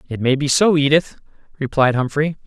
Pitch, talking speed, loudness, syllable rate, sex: 145 Hz, 170 wpm, -17 LUFS, 5.4 syllables/s, male